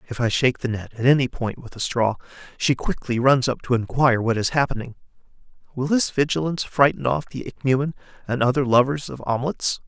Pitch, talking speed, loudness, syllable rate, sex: 130 Hz, 195 wpm, -22 LUFS, 6.2 syllables/s, male